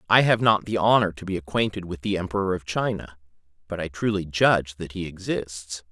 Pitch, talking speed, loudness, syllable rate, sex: 95 Hz, 205 wpm, -24 LUFS, 5.6 syllables/s, male